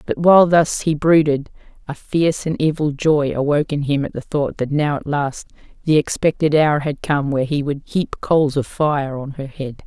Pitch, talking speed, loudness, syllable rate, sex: 145 Hz, 215 wpm, -18 LUFS, 4.9 syllables/s, female